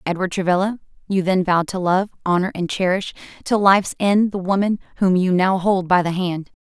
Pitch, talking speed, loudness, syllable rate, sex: 185 Hz, 200 wpm, -19 LUFS, 5.5 syllables/s, female